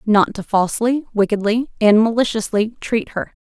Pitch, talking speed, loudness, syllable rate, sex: 220 Hz, 140 wpm, -18 LUFS, 4.9 syllables/s, female